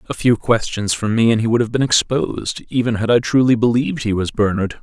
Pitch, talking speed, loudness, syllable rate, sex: 115 Hz, 235 wpm, -17 LUFS, 5.9 syllables/s, male